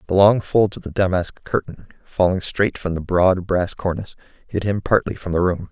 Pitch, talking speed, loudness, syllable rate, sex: 95 Hz, 210 wpm, -20 LUFS, 5.2 syllables/s, male